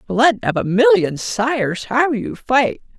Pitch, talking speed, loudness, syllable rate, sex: 220 Hz, 160 wpm, -17 LUFS, 3.7 syllables/s, male